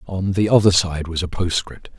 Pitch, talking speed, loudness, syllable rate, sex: 90 Hz, 210 wpm, -19 LUFS, 5.0 syllables/s, male